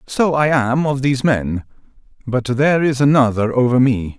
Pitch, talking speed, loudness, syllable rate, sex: 130 Hz, 170 wpm, -16 LUFS, 4.9 syllables/s, male